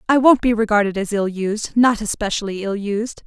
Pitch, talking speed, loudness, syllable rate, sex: 215 Hz, 220 wpm, -19 LUFS, 5.2 syllables/s, female